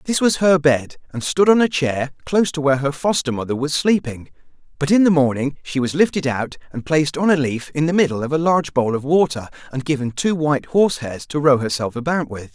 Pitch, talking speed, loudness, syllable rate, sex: 145 Hz, 240 wpm, -19 LUFS, 5.9 syllables/s, male